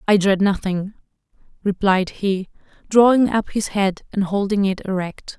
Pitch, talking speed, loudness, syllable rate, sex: 200 Hz, 145 wpm, -19 LUFS, 4.5 syllables/s, female